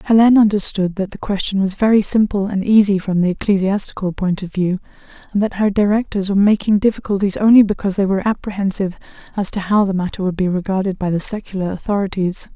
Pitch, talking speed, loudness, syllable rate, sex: 195 Hz, 190 wpm, -17 LUFS, 6.5 syllables/s, female